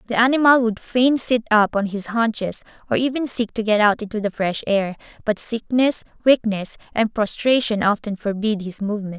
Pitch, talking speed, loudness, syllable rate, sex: 220 Hz, 185 wpm, -20 LUFS, 5.1 syllables/s, female